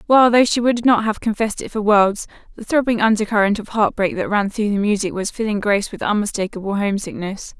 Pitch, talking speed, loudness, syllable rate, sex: 210 Hz, 215 wpm, -18 LUFS, 6.2 syllables/s, female